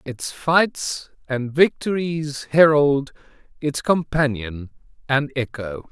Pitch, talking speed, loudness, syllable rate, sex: 140 Hz, 90 wpm, -21 LUFS, 3.2 syllables/s, male